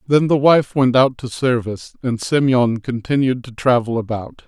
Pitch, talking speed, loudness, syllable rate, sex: 125 Hz, 175 wpm, -17 LUFS, 4.7 syllables/s, male